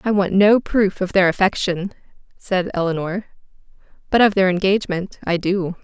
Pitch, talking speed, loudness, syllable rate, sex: 190 Hz, 155 wpm, -18 LUFS, 5.0 syllables/s, female